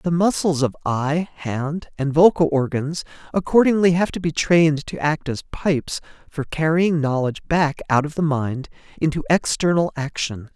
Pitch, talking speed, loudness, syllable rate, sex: 155 Hz, 160 wpm, -20 LUFS, 4.6 syllables/s, male